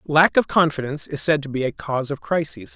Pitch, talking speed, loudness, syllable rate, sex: 145 Hz, 240 wpm, -21 LUFS, 6.0 syllables/s, male